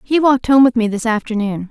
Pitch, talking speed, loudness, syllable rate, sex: 235 Hz, 245 wpm, -15 LUFS, 6.2 syllables/s, female